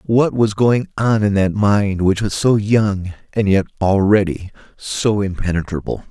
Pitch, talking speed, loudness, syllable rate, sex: 100 Hz, 155 wpm, -17 LUFS, 4.2 syllables/s, male